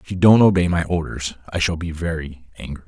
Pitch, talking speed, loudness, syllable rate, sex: 85 Hz, 230 wpm, -19 LUFS, 5.8 syllables/s, male